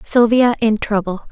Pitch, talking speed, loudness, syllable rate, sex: 220 Hz, 135 wpm, -15 LUFS, 4.3 syllables/s, female